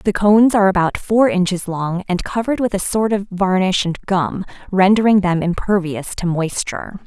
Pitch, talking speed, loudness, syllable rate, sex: 190 Hz, 180 wpm, -17 LUFS, 5.0 syllables/s, female